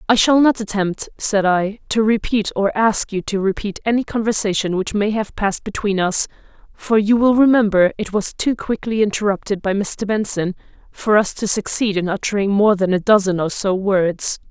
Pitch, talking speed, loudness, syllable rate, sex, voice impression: 205 Hz, 190 wpm, -18 LUFS, 5.0 syllables/s, female, feminine, adult-like, slightly powerful, clear, fluent, intellectual, calm, lively, sharp